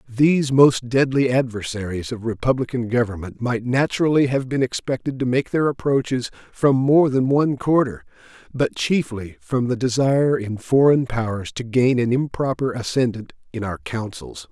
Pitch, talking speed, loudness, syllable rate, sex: 125 Hz, 155 wpm, -20 LUFS, 4.9 syllables/s, male